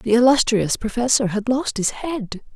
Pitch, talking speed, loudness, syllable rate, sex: 235 Hz, 165 wpm, -19 LUFS, 4.6 syllables/s, female